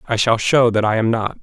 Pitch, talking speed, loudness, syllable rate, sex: 115 Hz, 295 wpm, -16 LUFS, 5.7 syllables/s, male